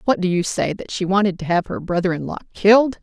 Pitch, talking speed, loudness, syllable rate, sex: 190 Hz, 260 wpm, -19 LUFS, 6.3 syllables/s, female